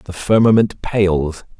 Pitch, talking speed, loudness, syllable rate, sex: 95 Hz, 115 wpm, -16 LUFS, 3.5 syllables/s, male